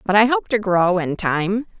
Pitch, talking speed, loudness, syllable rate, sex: 200 Hz, 235 wpm, -19 LUFS, 4.4 syllables/s, female